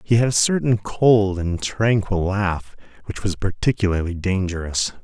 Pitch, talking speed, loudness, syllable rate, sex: 100 Hz, 145 wpm, -20 LUFS, 4.4 syllables/s, male